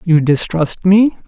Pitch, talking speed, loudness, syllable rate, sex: 175 Hz, 140 wpm, -13 LUFS, 3.6 syllables/s, female